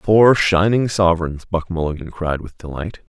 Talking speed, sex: 150 wpm, male